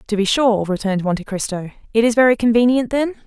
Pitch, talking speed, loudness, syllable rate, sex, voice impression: 220 Hz, 200 wpm, -17 LUFS, 6.6 syllables/s, female, feminine, adult-like, tensed, powerful, slightly bright, clear, fluent, intellectual, calm, lively, slightly sharp